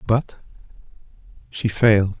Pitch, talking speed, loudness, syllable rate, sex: 110 Hz, 80 wpm, -19 LUFS, 4.0 syllables/s, male